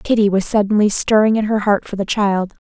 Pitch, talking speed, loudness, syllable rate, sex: 205 Hz, 225 wpm, -16 LUFS, 5.7 syllables/s, female